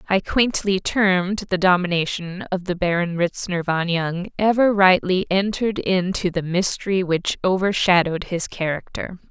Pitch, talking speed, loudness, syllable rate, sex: 185 Hz, 135 wpm, -20 LUFS, 4.7 syllables/s, female